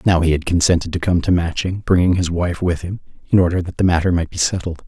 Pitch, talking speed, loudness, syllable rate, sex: 90 Hz, 260 wpm, -18 LUFS, 6.3 syllables/s, male